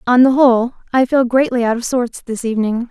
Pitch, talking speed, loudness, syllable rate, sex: 245 Hz, 225 wpm, -15 LUFS, 5.8 syllables/s, female